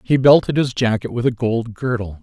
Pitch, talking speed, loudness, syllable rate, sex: 120 Hz, 215 wpm, -18 LUFS, 5.2 syllables/s, male